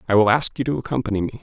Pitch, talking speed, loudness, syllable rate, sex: 120 Hz, 295 wpm, -20 LUFS, 8.0 syllables/s, male